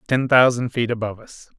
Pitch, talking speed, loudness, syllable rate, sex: 125 Hz, 190 wpm, -19 LUFS, 5.9 syllables/s, male